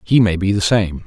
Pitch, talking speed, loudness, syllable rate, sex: 95 Hz, 280 wpm, -16 LUFS, 5.3 syllables/s, male